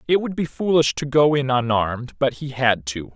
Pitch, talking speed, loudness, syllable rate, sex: 135 Hz, 230 wpm, -20 LUFS, 5.0 syllables/s, male